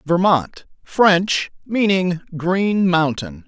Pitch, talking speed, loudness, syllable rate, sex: 180 Hz, 70 wpm, -18 LUFS, 2.7 syllables/s, male